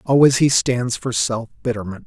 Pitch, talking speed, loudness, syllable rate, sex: 120 Hz, 175 wpm, -18 LUFS, 5.0 syllables/s, male